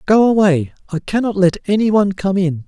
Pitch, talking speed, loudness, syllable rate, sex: 195 Hz, 200 wpm, -16 LUFS, 5.7 syllables/s, male